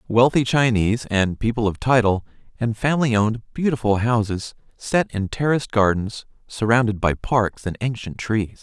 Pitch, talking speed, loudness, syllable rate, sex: 115 Hz, 145 wpm, -21 LUFS, 5.0 syllables/s, male